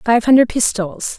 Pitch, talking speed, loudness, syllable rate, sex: 225 Hz, 150 wpm, -15 LUFS, 5.6 syllables/s, female